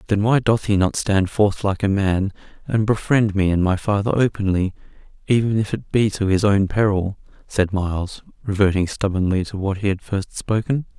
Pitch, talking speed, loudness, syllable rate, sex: 100 Hz, 190 wpm, -20 LUFS, 5.0 syllables/s, male